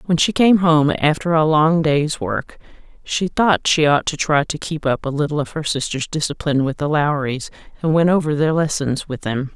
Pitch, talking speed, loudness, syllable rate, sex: 150 Hz, 215 wpm, -18 LUFS, 5.0 syllables/s, female